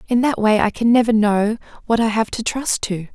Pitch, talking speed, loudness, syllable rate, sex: 220 Hz, 250 wpm, -18 LUFS, 5.3 syllables/s, female